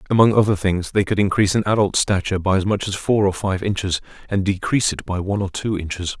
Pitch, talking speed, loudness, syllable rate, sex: 100 Hz, 240 wpm, -20 LUFS, 6.6 syllables/s, male